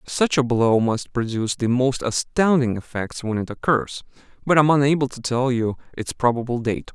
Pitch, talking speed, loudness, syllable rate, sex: 125 Hz, 190 wpm, -21 LUFS, 5.2 syllables/s, male